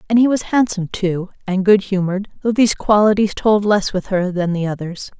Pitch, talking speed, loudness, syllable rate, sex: 200 Hz, 210 wpm, -17 LUFS, 5.6 syllables/s, female